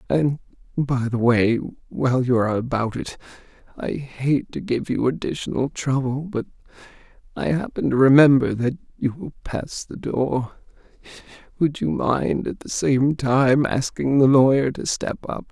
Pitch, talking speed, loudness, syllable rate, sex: 125 Hz, 145 wpm, -21 LUFS, 4.6 syllables/s, male